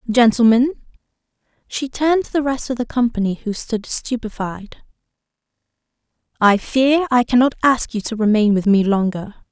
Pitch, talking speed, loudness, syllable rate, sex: 235 Hz, 130 wpm, -17 LUFS, 5.2 syllables/s, female